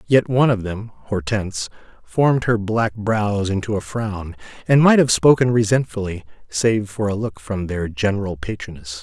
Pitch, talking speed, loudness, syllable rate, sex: 105 Hz, 155 wpm, -20 LUFS, 4.8 syllables/s, male